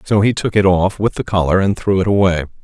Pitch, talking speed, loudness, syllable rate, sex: 95 Hz, 275 wpm, -15 LUFS, 6.0 syllables/s, male